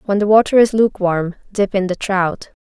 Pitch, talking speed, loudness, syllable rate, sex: 200 Hz, 205 wpm, -16 LUFS, 5.3 syllables/s, female